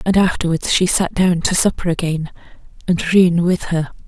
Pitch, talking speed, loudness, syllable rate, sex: 175 Hz, 175 wpm, -17 LUFS, 4.9 syllables/s, female